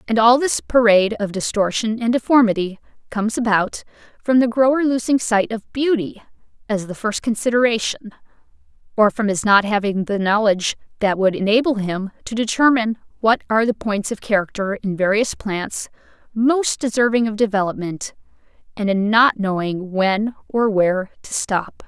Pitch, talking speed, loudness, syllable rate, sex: 215 Hz, 155 wpm, -19 LUFS, 5.1 syllables/s, female